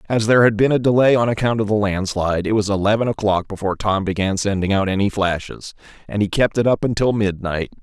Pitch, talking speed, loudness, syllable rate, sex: 105 Hz, 220 wpm, -18 LUFS, 6.3 syllables/s, male